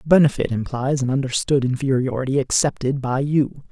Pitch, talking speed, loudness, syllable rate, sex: 135 Hz, 145 wpm, -20 LUFS, 5.7 syllables/s, male